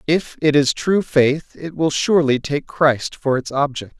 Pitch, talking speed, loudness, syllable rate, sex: 145 Hz, 195 wpm, -18 LUFS, 4.3 syllables/s, male